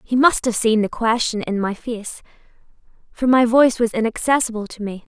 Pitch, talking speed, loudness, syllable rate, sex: 230 Hz, 185 wpm, -19 LUFS, 5.4 syllables/s, female